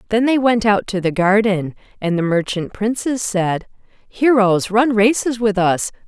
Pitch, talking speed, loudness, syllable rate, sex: 210 Hz, 170 wpm, -17 LUFS, 4.3 syllables/s, female